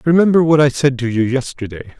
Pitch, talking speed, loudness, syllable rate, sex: 135 Hz, 210 wpm, -14 LUFS, 6.5 syllables/s, male